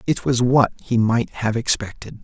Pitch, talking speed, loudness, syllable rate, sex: 120 Hz, 190 wpm, -20 LUFS, 4.6 syllables/s, male